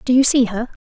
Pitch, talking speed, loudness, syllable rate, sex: 245 Hz, 290 wpm, -16 LUFS, 6.6 syllables/s, female